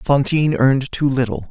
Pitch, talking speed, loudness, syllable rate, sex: 135 Hz, 160 wpm, -17 LUFS, 5.8 syllables/s, male